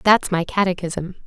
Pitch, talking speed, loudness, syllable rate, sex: 185 Hz, 145 wpm, -20 LUFS, 4.6 syllables/s, female